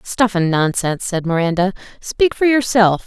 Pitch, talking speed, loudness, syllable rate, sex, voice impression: 200 Hz, 155 wpm, -16 LUFS, 4.8 syllables/s, female, very feminine, slightly adult-like, fluent, slightly intellectual, slightly elegant, slightly lively